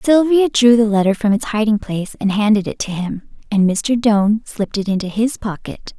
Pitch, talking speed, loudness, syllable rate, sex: 215 Hz, 210 wpm, -16 LUFS, 5.4 syllables/s, female